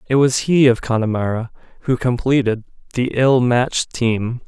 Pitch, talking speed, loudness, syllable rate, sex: 125 Hz, 150 wpm, -18 LUFS, 4.8 syllables/s, male